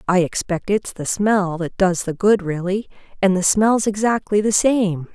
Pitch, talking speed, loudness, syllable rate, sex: 195 Hz, 175 wpm, -19 LUFS, 4.3 syllables/s, female